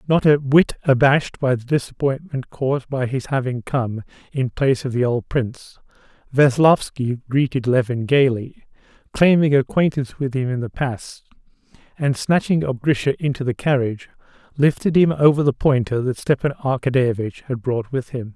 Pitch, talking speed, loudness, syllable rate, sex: 130 Hz, 155 wpm, -19 LUFS, 5.0 syllables/s, male